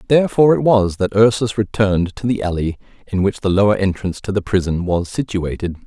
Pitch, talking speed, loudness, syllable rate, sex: 100 Hz, 195 wpm, -17 LUFS, 6.0 syllables/s, male